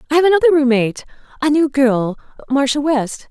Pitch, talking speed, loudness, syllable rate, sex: 275 Hz, 165 wpm, -16 LUFS, 6.3 syllables/s, female